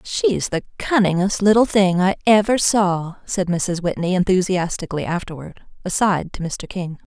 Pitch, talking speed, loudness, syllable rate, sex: 185 Hz, 145 wpm, -19 LUFS, 4.8 syllables/s, female